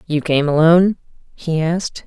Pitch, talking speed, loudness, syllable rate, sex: 165 Hz, 145 wpm, -16 LUFS, 5.1 syllables/s, female